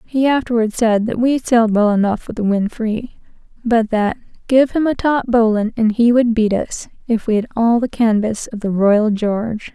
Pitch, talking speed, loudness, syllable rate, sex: 225 Hz, 210 wpm, -16 LUFS, 5.0 syllables/s, female